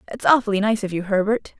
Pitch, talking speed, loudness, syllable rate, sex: 205 Hz, 225 wpm, -20 LUFS, 6.9 syllables/s, female